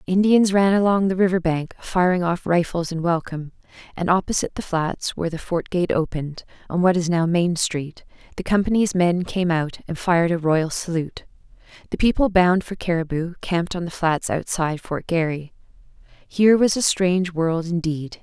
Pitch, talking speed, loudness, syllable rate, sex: 175 Hz, 180 wpm, -21 LUFS, 5.3 syllables/s, female